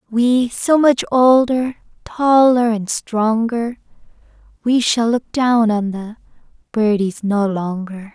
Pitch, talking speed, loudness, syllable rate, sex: 230 Hz, 120 wpm, -16 LUFS, 3.4 syllables/s, female